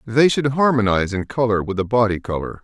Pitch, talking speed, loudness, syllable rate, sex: 115 Hz, 205 wpm, -19 LUFS, 6.1 syllables/s, male